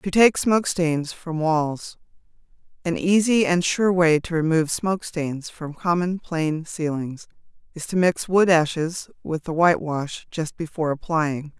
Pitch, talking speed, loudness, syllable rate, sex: 165 Hz, 150 wpm, -22 LUFS, 4.3 syllables/s, female